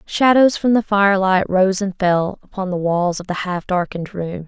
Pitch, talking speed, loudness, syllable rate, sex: 190 Hz, 200 wpm, -18 LUFS, 4.9 syllables/s, female